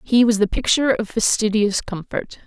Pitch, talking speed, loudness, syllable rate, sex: 220 Hz, 170 wpm, -19 LUFS, 5.2 syllables/s, female